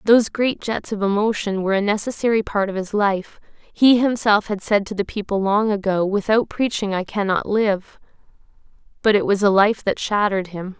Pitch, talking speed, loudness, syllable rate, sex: 205 Hz, 190 wpm, -20 LUFS, 5.2 syllables/s, female